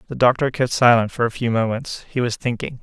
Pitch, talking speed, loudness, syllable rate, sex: 120 Hz, 235 wpm, -20 LUFS, 5.8 syllables/s, male